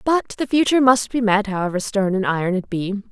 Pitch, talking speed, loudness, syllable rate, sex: 215 Hz, 230 wpm, -19 LUFS, 6.0 syllables/s, female